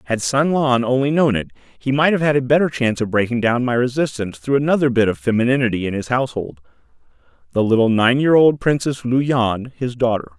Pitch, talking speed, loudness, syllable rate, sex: 125 Hz, 210 wpm, -18 LUFS, 6.0 syllables/s, male